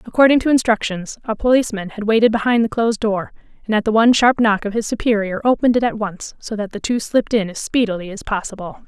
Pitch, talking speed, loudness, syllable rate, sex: 220 Hz, 230 wpm, -18 LUFS, 6.5 syllables/s, female